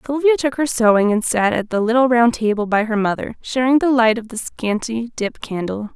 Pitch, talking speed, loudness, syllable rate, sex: 230 Hz, 220 wpm, -18 LUFS, 5.3 syllables/s, female